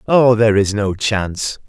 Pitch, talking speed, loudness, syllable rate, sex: 110 Hz, 180 wpm, -16 LUFS, 4.8 syllables/s, male